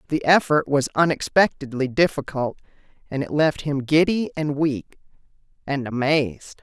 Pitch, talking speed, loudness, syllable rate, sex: 145 Hz, 120 wpm, -21 LUFS, 4.7 syllables/s, female